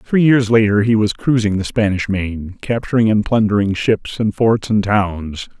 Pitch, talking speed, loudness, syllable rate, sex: 105 Hz, 180 wpm, -16 LUFS, 4.4 syllables/s, male